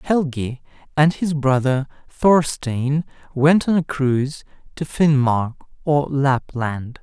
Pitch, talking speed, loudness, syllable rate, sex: 140 Hz, 110 wpm, -19 LUFS, 3.5 syllables/s, male